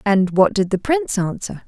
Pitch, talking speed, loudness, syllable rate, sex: 210 Hz, 215 wpm, -18 LUFS, 5.1 syllables/s, female